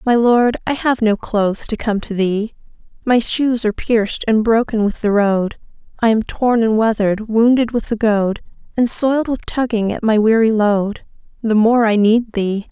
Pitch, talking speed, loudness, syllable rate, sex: 220 Hz, 195 wpm, -16 LUFS, 4.7 syllables/s, female